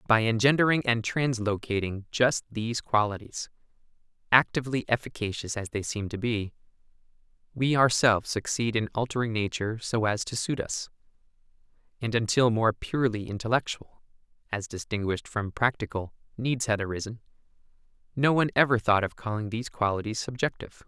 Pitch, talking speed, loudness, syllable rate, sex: 115 Hz, 130 wpm, -27 LUFS, 5.6 syllables/s, male